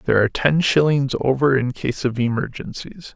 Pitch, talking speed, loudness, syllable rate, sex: 135 Hz, 170 wpm, -19 LUFS, 5.4 syllables/s, male